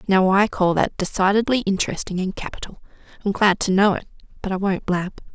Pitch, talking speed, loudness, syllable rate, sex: 195 Hz, 190 wpm, -21 LUFS, 5.8 syllables/s, female